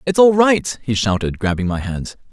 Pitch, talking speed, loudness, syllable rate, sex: 130 Hz, 205 wpm, -17 LUFS, 4.9 syllables/s, male